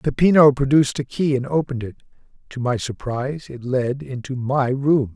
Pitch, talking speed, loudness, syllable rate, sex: 130 Hz, 175 wpm, -20 LUFS, 5.3 syllables/s, male